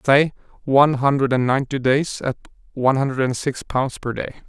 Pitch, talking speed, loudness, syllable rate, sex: 135 Hz, 160 wpm, -20 LUFS, 5.1 syllables/s, male